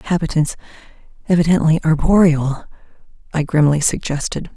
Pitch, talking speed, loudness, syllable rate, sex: 160 Hz, 80 wpm, -17 LUFS, 5.5 syllables/s, female